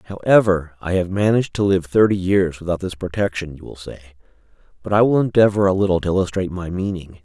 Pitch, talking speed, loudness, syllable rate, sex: 95 Hz, 200 wpm, -19 LUFS, 6.3 syllables/s, male